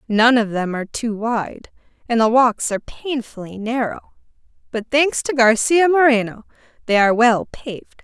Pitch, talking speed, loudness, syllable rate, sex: 235 Hz, 155 wpm, -18 LUFS, 4.7 syllables/s, female